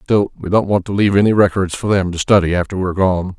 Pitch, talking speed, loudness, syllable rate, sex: 95 Hz, 265 wpm, -16 LUFS, 6.4 syllables/s, male